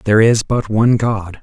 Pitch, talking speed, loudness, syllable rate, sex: 110 Hz, 210 wpm, -15 LUFS, 5.0 syllables/s, male